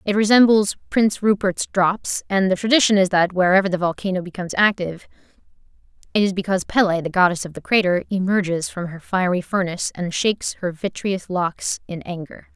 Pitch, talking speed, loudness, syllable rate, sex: 190 Hz, 170 wpm, -20 LUFS, 5.7 syllables/s, female